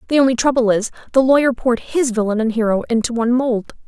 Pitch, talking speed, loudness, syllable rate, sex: 240 Hz, 215 wpm, -17 LUFS, 6.7 syllables/s, female